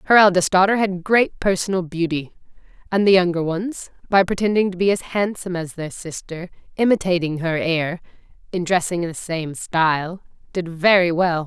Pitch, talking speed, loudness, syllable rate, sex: 180 Hz, 165 wpm, -20 LUFS, 5.2 syllables/s, female